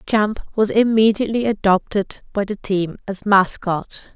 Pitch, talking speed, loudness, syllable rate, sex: 205 Hz, 130 wpm, -19 LUFS, 4.5 syllables/s, female